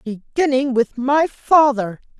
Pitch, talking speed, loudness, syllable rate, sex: 260 Hz, 110 wpm, -17 LUFS, 3.6 syllables/s, female